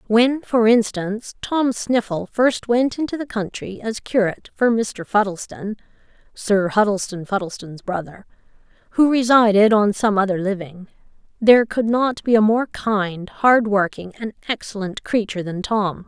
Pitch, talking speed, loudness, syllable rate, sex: 215 Hz, 140 wpm, -19 LUFS, 4.2 syllables/s, female